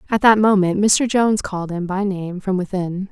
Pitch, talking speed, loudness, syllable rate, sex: 195 Hz, 210 wpm, -18 LUFS, 5.2 syllables/s, female